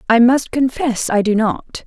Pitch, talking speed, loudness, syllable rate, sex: 240 Hz, 195 wpm, -16 LUFS, 4.2 syllables/s, female